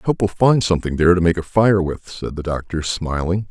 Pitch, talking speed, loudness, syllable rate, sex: 90 Hz, 255 wpm, -18 LUFS, 5.9 syllables/s, male